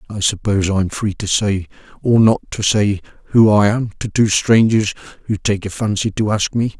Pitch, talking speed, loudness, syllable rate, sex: 105 Hz, 210 wpm, -16 LUFS, 5.1 syllables/s, male